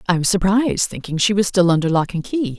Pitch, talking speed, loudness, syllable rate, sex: 185 Hz, 255 wpm, -18 LUFS, 6.2 syllables/s, female